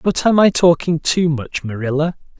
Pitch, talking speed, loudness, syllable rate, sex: 160 Hz, 175 wpm, -16 LUFS, 4.8 syllables/s, male